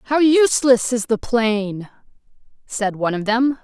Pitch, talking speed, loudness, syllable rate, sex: 235 Hz, 150 wpm, -18 LUFS, 4.6 syllables/s, female